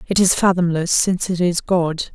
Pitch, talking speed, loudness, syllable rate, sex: 175 Hz, 195 wpm, -18 LUFS, 5.0 syllables/s, female